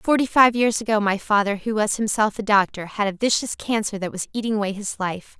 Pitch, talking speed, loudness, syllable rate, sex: 210 Hz, 235 wpm, -21 LUFS, 5.7 syllables/s, female